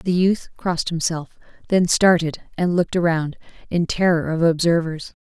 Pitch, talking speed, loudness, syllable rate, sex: 170 Hz, 150 wpm, -20 LUFS, 4.7 syllables/s, female